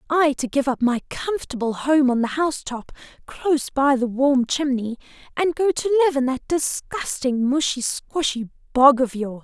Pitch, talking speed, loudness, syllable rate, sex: 270 Hz, 180 wpm, -21 LUFS, 4.8 syllables/s, female